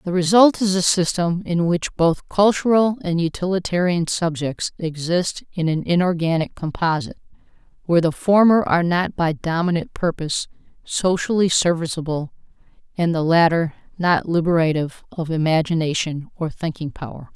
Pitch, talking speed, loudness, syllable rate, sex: 170 Hz, 130 wpm, -20 LUFS, 5.1 syllables/s, female